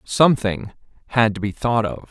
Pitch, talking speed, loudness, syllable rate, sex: 110 Hz, 170 wpm, -20 LUFS, 5.1 syllables/s, male